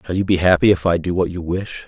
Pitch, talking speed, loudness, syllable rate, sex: 90 Hz, 320 wpm, -18 LUFS, 6.4 syllables/s, male